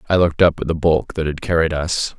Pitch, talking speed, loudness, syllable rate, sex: 80 Hz, 275 wpm, -18 LUFS, 6.0 syllables/s, male